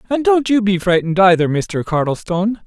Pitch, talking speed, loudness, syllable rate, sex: 195 Hz, 180 wpm, -16 LUFS, 5.7 syllables/s, male